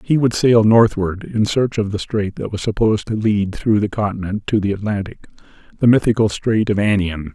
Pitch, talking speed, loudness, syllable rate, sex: 105 Hz, 195 wpm, -17 LUFS, 5.3 syllables/s, male